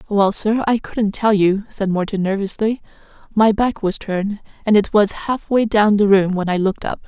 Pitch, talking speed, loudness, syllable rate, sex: 205 Hz, 205 wpm, -18 LUFS, 5.0 syllables/s, female